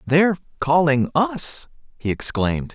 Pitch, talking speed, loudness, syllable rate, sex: 150 Hz, 110 wpm, -21 LUFS, 4.4 syllables/s, male